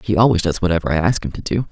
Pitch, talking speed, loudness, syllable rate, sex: 95 Hz, 315 wpm, -18 LUFS, 7.5 syllables/s, male